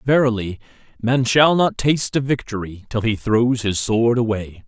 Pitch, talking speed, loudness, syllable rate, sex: 120 Hz, 165 wpm, -19 LUFS, 4.7 syllables/s, male